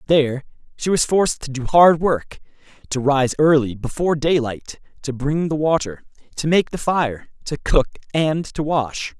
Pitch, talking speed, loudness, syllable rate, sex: 145 Hz, 170 wpm, -19 LUFS, 4.6 syllables/s, male